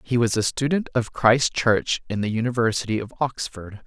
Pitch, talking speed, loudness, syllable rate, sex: 120 Hz, 185 wpm, -22 LUFS, 5.0 syllables/s, male